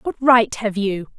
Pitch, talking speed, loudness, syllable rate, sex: 220 Hz, 205 wpm, -18 LUFS, 3.8 syllables/s, female